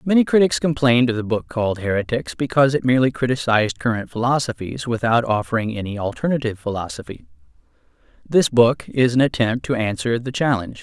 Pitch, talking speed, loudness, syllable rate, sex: 120 Hz, 155 wpm, -20 LUFS, 6.3 syllables/s, male